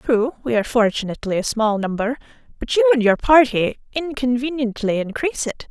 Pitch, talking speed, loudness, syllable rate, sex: 245 Hz, 160 wpm, -19 LUFS, 5.7 syllables/s, female